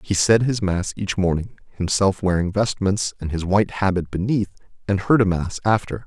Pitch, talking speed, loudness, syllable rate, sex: 100 Hz, 190 wpm, -21 LUFS, 5.2 syllables/s, male